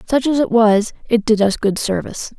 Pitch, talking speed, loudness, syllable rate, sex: 225 Hz, 225 wpm, -16 LUFS, 5.4 syllables/s, female